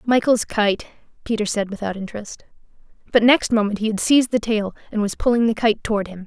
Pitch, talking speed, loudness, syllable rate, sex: 215 Hz, 200 wpm, -20 LUFS, 6.1 syllables/s, female